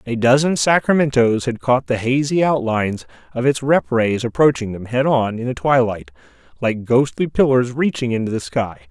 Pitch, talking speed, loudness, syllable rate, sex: 125 Hz, 175 wpm, -18 LUFS, 5.0 syllables/s, male